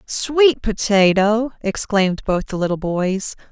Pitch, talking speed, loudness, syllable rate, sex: 210 Hz, 120 wpm, -18 LUFS, 3.9 syllables/s, female